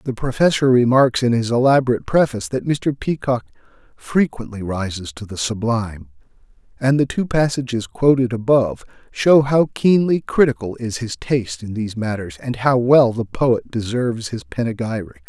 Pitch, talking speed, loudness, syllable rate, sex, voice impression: 120 Hz, 155 wpm, -19 LUFS, 5.2 syllables/s, male, masculine, slightly old, thick, tensed, powerful, slightly muffled, slightly halting, slightly raspy, calm, mature, friendly, reassuring, wild, lively, slightly kind